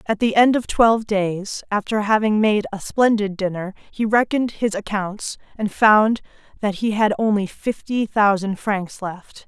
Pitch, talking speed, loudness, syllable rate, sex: 210 Hz, 165 wpm, -20 LUFS, 4.3 syllables/s, female